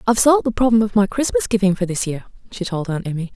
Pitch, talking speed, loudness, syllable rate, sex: 200 Hz, 270 wpm, -18 LUFS, 7.1 syllables/s, female